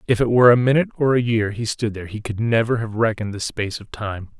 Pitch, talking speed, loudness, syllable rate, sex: 115 Hz, 275 wpm, -20 LUFS, 6.8 syllables/s, male